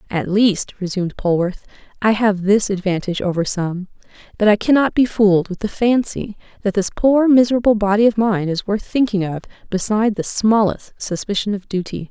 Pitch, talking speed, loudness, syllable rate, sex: 205 Hz, 175 wpm, -18 LUFS, 5.4 syllables/s, female